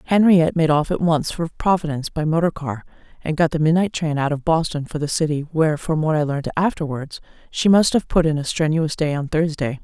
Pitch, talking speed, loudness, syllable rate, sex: 155 Hz, 225 wpm, -20 LUFS, 5.8 syllables/s, female